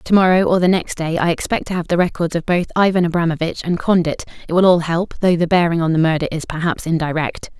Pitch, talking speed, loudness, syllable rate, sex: 170 Hz, 245 wpm, -17 LUFS, 6.3 syllables/s, female